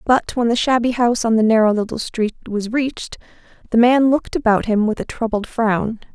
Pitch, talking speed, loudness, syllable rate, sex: 230 Hz, 205 wpm, -18 LUFS, 5.5 syllables/s, female